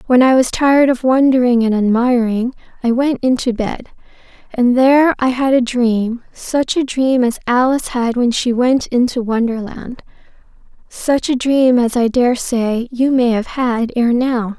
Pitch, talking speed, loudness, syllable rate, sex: 245 Hz, 165 wpm, -15 LUFS, 4.4 syllables/s, female